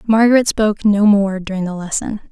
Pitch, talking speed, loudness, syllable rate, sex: 205 Hz, 180 wpm, -15 LUFS, 5.6 syllables/s, female